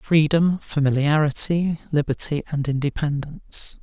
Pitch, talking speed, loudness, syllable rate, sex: 150 Hz, 80 wpm, -21 LUFS, 4.5 syllables/s, male